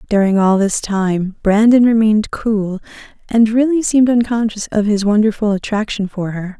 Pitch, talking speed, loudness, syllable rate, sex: 215 Hz, 155 wpm, -15 LUFS, 5.0 syllables/s, female